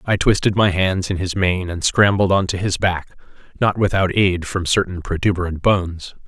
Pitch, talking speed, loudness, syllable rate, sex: 95 Hz, 180 wpm, -18 LUFS, 5.0 syllables/s, male